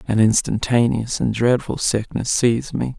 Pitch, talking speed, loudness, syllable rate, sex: 115 Hz, 140 wpm, -19 LUFS, 4.6 syllables/s, male